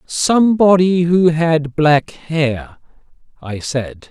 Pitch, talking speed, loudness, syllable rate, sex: 155 Hz, 100 wpm, -15 LUFS, 3.0 syllables/s, male